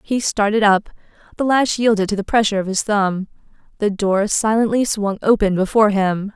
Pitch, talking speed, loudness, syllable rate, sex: 210 Hz, 180 wpm, -17 LUFS, 5.3 syllables/s, female